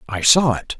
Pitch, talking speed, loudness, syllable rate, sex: 125 Hz, 225 wpm, -16 LUFS, 4.9 syllables/s, female